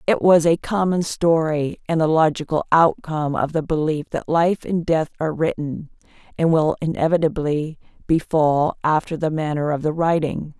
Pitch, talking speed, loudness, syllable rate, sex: 160 Hz, 160 wpm, -20 LUFS, 4.8 syllables/s, female